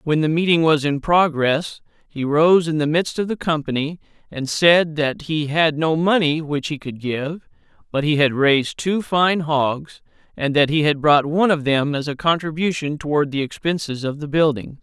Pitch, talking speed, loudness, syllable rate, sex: 155 Hz, 200 wpm, -19 LUFS, 4.7 syllables/s, male